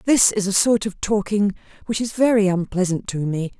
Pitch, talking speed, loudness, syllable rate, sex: 200 Hz, 200 wpm, -20 LUFS, 5.2 syllables/s, female